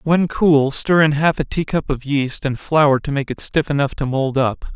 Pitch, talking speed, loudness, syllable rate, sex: 145 Hz, 250 wpm, -18 LUFS, 4.5 syllables/s, male